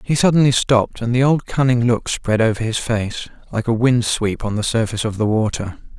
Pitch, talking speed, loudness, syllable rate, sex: 115 Hz, 220 wpm, -18 LUFS, 5.6 syllables/s, male